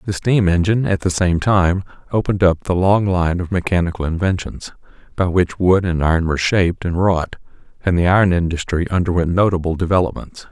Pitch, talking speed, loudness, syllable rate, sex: 90 Hz, 175 wpm, -17 LUFS, 5.8 syllables/s, male